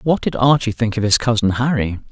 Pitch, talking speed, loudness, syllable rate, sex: 115 Hz, 225 wpm, -17 LUFS, 5.6 syllables/s, male